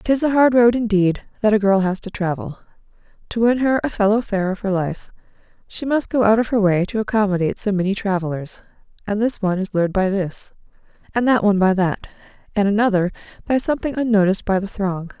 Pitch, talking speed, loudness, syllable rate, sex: 205 Hz, 200 wpm, -19 LUFS, 6.2 syllables/s, female